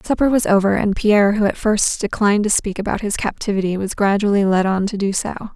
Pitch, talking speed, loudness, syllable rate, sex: 205 Hz, 225 wpm, -18 LUFS, 5.9 syllables/s, female